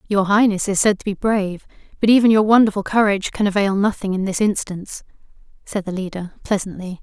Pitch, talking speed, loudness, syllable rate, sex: 200 Hz, 190 wpm, -18 LUFS, 6.2 syllables/s, female